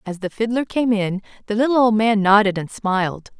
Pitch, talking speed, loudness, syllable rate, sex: 215 Hz, 210 wpm, -19 LUFS, 5.4 syllables/s, female